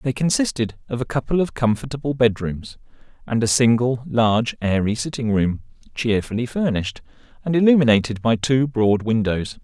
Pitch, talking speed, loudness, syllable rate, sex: 120 Hz, 150 wpm, -20 LUFS, 5.3 syllables/s, male